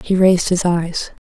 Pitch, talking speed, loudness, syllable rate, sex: 180 Hz, 190 wpm, -17 LUFS, 4.8 syllables/s, female